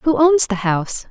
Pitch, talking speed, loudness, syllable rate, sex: 250 Hz, 220 wpm, -16 LUFS, 4.8 syllables/s, female